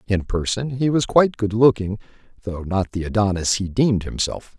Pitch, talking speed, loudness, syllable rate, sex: 105 Hz, 185 wpm, -20 LUFS, 5.3 syllables/s, male